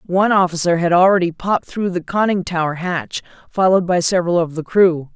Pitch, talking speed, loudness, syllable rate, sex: 175 Hz, 185 wpm, -17 LUFS, 5.9 syllables/s, female